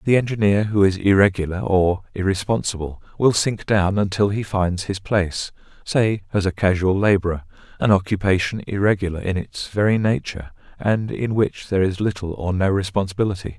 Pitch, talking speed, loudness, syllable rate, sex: 100 Hz, 160 wpm, -20 LUFS, 5.4 syllables/s, male